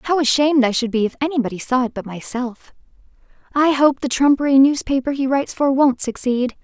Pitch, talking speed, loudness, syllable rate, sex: 265 Hz, 190 wpm, -18 LUFS, 5.9 syllables/s, female